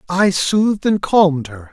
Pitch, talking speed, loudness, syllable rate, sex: 175 Hz, 175 wpm, -16 LUFS, 4.6 syllables/s, male